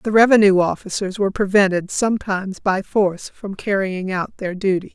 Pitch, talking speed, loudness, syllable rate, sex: 195 Hz, 160 wpm, -19 LUFS, 5.4 syllables/s, female